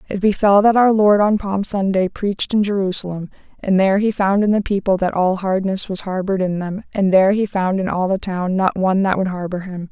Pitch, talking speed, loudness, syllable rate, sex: 195 Hz, 235 wpm, -18 LUFS, 5.7 syllables/s, female